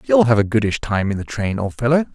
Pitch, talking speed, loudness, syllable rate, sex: 115 Hz, 280 wpm, -19 LUFS, 6.1 syllables/s, male